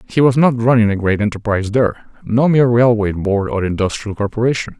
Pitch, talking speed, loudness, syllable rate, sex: 115 Hz, 190 wpm, -15 LUFS, 6.1 syllables/s, male